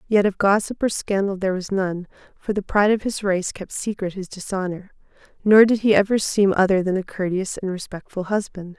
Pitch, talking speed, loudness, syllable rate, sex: 195 Hz, 205 wpm, -21 LUFS, 5.5 syllables/s, female